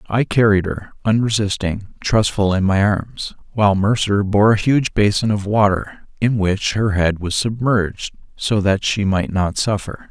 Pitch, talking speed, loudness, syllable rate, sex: 105 Hz, 165 wpm, -18 LUFS, 4.4 syllables/s, male